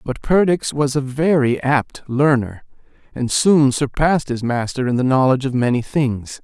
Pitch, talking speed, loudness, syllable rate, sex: 135 Hz, 170 wpm, -18 LUFS, 4.7 syllables/s, male